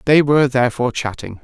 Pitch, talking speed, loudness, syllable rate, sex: 130 Hz, 165 wpm, -16 LUFS, 7.0 syllables/s, male